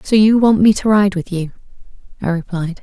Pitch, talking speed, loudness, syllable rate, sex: 195 Hz, 210 wpm, -15 LUFS, 5.4 syllables/s, female